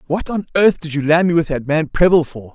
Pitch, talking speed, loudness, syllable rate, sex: 160 Hz, 285 wpm, -16 LUFS, 5.6 syllables/s, male